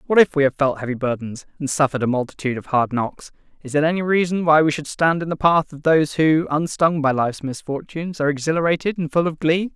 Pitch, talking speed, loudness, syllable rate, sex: 150 Hz, 235 wpm, -20 LUFS, 6.3 syllables/s, male